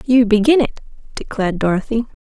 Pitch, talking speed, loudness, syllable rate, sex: 225 Hz, 135 wpm, -16 LUFS, 6.0 syllables/s, female